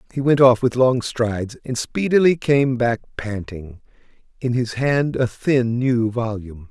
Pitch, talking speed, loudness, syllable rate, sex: 120 Hz, 160 wpm, -19 LUFS, 4.3 syllables/s, male